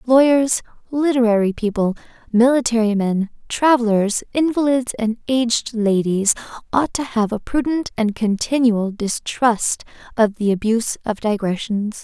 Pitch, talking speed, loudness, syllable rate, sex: 230 Hz, 115 wpm, -19 LUFS, 4.5 syllables/s, female